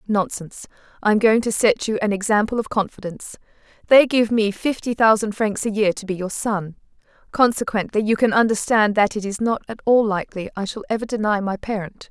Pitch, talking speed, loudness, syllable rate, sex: 215 Hz, 200 wpm, -20 LUFS, 5.7 syllables/s, female